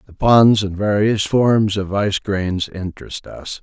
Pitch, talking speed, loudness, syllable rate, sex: 100 Hz, 165 wpm, -17 LUFS, 4.0 syllables/s, male